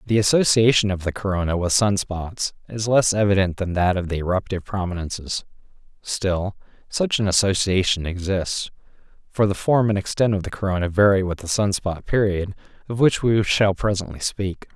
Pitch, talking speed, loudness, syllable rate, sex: 100 Hz, 170 wpm, -21 LUFS, 5.2 syllables/s, male